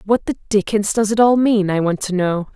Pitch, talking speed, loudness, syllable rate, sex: 205 Hz, 260 wpm, -17 LUFS, 5.4 syllables/s, female